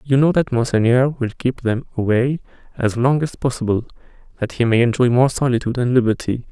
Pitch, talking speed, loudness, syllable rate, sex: 125 Hz, 185 wpm, -18 LUFS, 5.8 syllables/s, male